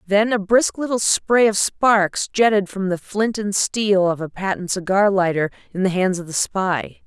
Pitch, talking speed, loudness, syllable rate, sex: 195 Hz, 205 wpm, -19 LUFS, 4.3 syllables/s, female